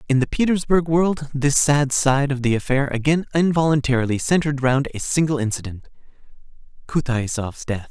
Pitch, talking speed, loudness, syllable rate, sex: 140 Hz, 145 wpm, -20 LUFS, 5.3 syllables/s, male